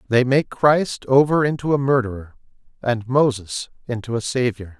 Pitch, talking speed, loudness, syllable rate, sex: 125 Hz, 150 wpm, -20 LUFS, 4.8 syllables/s, male